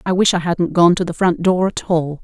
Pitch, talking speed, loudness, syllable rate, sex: 175 Hz, 295 wpm, -16 LUFS, 5.2 syllables/s, female